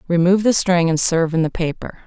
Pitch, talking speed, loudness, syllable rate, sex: 175 Hz, 235 wpm, -17 LUFS, 6.4 syllables/s, female